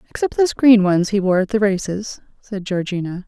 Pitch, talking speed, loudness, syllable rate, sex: 200 Hz, 200 wpm, -18 LUFS, 5.6 syllables/s, female